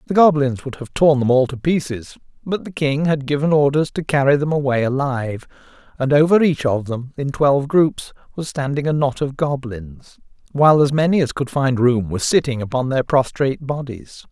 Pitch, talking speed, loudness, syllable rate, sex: 140 Hz, 195 wpm, -18 LUFS, 5.3 syllables/s, male